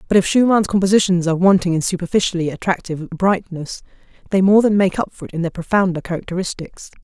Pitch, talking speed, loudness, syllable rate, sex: 180 Hz, 180 wpm, -17 LUFS, 6.5 syllables/s, female